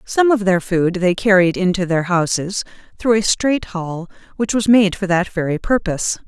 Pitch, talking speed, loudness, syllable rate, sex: 190 Hz, 190 wpm, -17 LUFS, 4.7 syllables/s, female